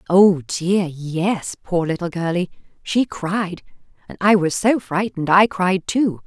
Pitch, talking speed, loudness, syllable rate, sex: 185 Hz, 155 wpm, -19 LUFS, 3.9 syllables/s, female